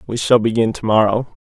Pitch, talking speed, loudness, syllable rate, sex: 115 Hz, 210 wpm, -16 LUFS, 5.7 syllables/s, male